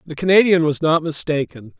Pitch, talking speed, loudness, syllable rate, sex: 160 Hz, 170 wpm, -17 LUFS, 5.4 syllables/s, male